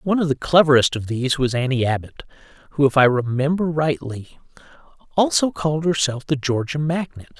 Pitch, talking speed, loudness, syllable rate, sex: 140 Hz, 160 wpm, -19 LUFS, 5.7 syllables/s, male